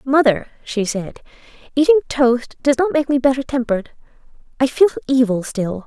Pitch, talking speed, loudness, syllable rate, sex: 255 Hz, 155 wpm, -18 LUFS, 5.3 syllables/s, female